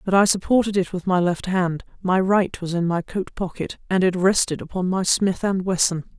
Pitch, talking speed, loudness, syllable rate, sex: 185 Hz, 215 wpm, -21 LUFS, 5.1 syllables/s, female